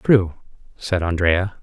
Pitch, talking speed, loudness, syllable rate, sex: 95 Hz, 110 wpm, -19 LUFS, 3.7 syllables/s, male